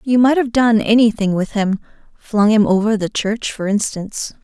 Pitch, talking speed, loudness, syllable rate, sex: 215 Hz, 175 wpm, -16 LUFS, 4.8 syllables/s, female